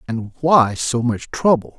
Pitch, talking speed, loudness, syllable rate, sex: 130 Hz, 170 wpm, -18 LUFS, 4.1 syllables/s, male